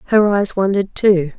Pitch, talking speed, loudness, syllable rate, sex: 195 Hz, 175 wpm, -16 LUFS, 5.4 syllables/s, female